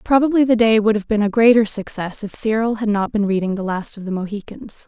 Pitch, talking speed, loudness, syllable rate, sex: 215 Hz, 245 wpm, -18 LUFS, 5.9 syllables/s, female